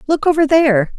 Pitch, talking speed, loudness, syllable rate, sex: 280 Hz, 185 wpm, -13 LUFS, 6.3 syllables/s, female